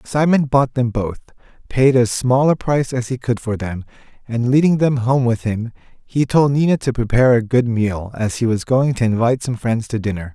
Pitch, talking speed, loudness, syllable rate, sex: 125 Hz, 220 wpm, -17 LUFS, 5.2 syllables/s, male